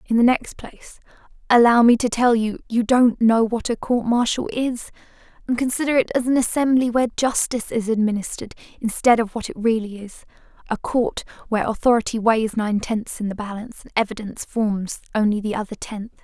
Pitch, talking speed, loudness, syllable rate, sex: 230 Hz, 180 wpm, -20 LUFS, 5.7 syllables/s, female